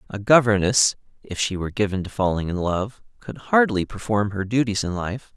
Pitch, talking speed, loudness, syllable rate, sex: 105 Hz, 190 wpm, -22 LUFS, 5.3 syllables/s, male